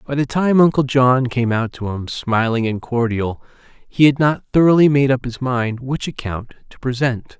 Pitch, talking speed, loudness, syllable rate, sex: 125 Hz, 195 wpm, -17 LUFS, 4.6 syllables/s, male